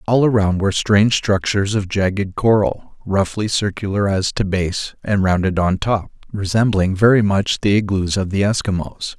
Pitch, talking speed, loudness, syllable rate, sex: 100 Hz, 165 wpm, -18 LUFS, 4.8 syllables/s, male